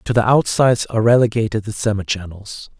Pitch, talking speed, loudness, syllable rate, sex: 110 Hz, 150 wpm, -17 LUFS, 6.1 syllables/s, male